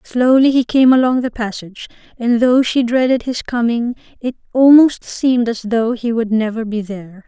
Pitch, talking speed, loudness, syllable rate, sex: 240 Hz, 180 wpm, -15 LUFS, 5.0 syllables/s, female